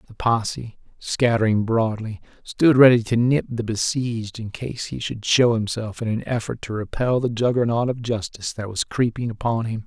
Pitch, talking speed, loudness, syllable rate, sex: 115 Hz, 180 wpm, -22 LUFS, 5.0 syllables/s, male